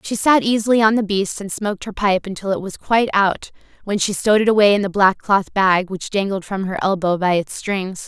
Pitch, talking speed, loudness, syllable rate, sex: 200 Hz, 245 wpm, -18 LUFS, 5.6 syllables/s, female